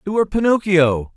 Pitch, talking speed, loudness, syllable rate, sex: 180 Hz, 155 wpm, -17 LUFS, 5.9 syllables/s, male